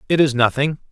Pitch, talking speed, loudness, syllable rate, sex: 140 Hz, 195 wpm, -17 LUFS, 6.3 syllables/s, male